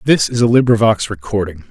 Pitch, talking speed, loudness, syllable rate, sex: 110 Hz, 175 wpm, -14 LUFS, 6.0 syllables/s, male